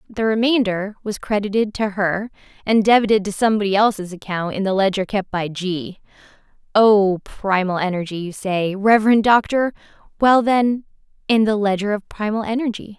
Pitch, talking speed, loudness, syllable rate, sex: 205 Hz, 150 wpm, -19 LUFS, 5.2 syllables/s, female